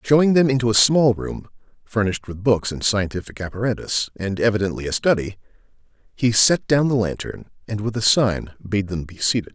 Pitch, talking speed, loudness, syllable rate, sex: 110 Hz, 180 wpm, -20 LUFS, 5.5 syllables/s, male